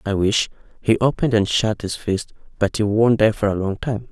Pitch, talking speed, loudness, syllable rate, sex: 110 Hz, 235 wpm, -20 LUFS, 5.3 syllables/s, male